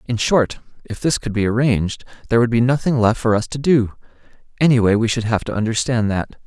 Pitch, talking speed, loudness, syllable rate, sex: 115 Hz, 215 wpm, -18 LUFS, 6.0 syllables/s, male